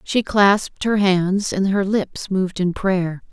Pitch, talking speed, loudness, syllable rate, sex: 195 Hz, 180 wpm, -19 LUFS, 3.8 syllables/s, female